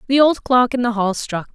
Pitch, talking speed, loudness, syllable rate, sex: 240 Hz, 270 wpm, -17 LUFS, 5.3 syllables/s, female